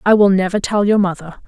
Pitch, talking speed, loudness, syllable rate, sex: 195 Hz, 245 wpm, -15 LUFS, 5.9 syllables/s, female